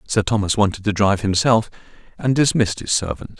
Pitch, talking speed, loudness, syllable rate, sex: 105 Hz, 175 wpm, -19 LUFS, 6.2 syllables/s, male